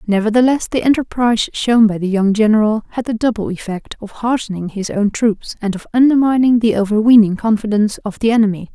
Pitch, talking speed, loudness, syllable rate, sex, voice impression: 220 Hz, 180 wpm, -15 LUFS, 5.9 syllables/s, female, very feminine, slightly young, slightly adult-like, thin, tensed, slightly powerful, bright, hard, clear, very fluent, cute, slightly cool, intellectual, refreshing, sincere, very calm, very friendly, very reassuring, very elegant, slightly lively, slightly strict, slightly sharp